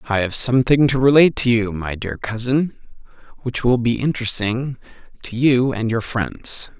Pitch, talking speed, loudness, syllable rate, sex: 120 Hz, 170 wpm, -18 LUFS, 4.9 syllables/s, male